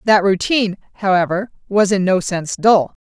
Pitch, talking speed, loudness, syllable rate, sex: 195 Hz, 160 wpm, -17 LUFS, 5.3 syllables/s, female